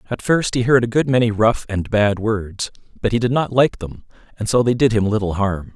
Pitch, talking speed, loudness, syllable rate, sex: 110 Hz, 250 wpm, -18 LUFS, 5.3 syllables/s, male